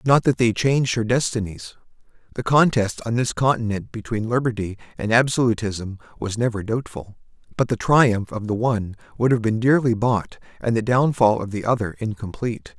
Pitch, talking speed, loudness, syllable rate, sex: 115 Hz, 170 wpm, -21 LUFS, 5.3 syllables/s, male